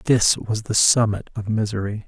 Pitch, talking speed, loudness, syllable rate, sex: 110 Hz, 175 wpm, -20 LUFS, 4.8 syllables/s, male